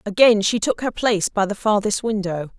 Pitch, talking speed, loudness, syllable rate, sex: 210 Hz, 210 wpm, -19 LUFS, 5.4 syllables/s, female